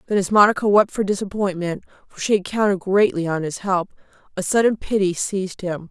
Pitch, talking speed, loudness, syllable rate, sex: 195 Hz, 175 wpm, -20 LUFS, 5.8 syllables/s, female